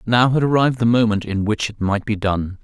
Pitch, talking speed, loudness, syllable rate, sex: 110 Hz, 250 wpm, -18 LUFS, 5.6 syllables/s, male